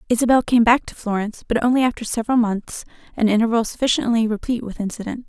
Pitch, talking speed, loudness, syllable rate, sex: 230 Hz, 180 wpm, -20 LUFS, 7.0 syllables/s, female